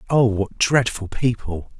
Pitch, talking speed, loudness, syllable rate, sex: 110 Hz, 135 wpm, -20 LUFS, 3.9 syllables/s, male